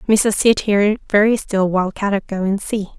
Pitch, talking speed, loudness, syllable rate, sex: 205 Hz, 200 wpm, -17 LUFS, 5.8 syllables/s, female